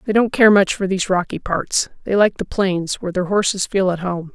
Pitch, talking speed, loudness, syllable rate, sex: 190 Hz, 250 wpm, -18 LUFS, 5.4 syllables/s, female